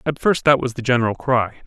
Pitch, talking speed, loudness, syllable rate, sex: 125 Hz, 255 wpm, -19 LUFS, 6.2 syllables/s, male